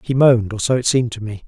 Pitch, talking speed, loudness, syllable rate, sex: 120 Hz, 325 wpm, -17 LUFS, 7.3 syllables/s, male